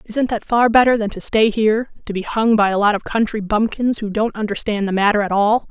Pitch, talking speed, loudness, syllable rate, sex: 215 Hz, 250 wpm, -17 LUFS, 5.6 syllables/s, female